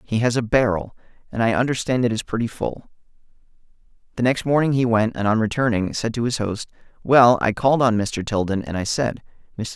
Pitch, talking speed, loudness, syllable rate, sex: 115 Hz, 205 wpm, -20 LUFS, 5.4 syllables/s, male